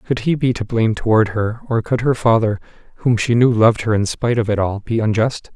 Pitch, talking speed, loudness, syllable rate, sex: 115 Hz, 250 wpm, -17 LUFS, 5.9 syllables/s, male